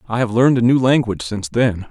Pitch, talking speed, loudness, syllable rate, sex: 115 Hz, 250 wpm, -16 LUFS, 6.9 syllables/s, male